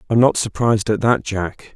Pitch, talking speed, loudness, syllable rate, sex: 110 Hz, 205 wpm, -18 LUFS, 5.2 syllables/s, male